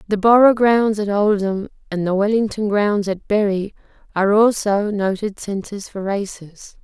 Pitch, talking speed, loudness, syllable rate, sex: 205 Hz, 150 wpm, -18 LUFS, 4.5 syllables/s, female